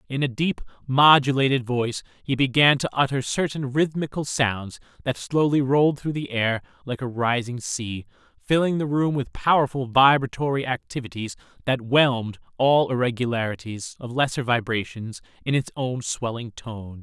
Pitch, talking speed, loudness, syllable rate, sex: 125 Hz, 145 wpm, -23 LUFS, 4.9 syllables/s, male